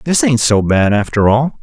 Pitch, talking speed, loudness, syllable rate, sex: 115 Hz, 220 wpm, -13 LUFS, 4.4 syllables/s, male